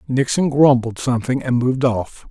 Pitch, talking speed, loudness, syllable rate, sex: 125 Hz, 155 wpm, -18 LUFS, 5.2 syllables/s, male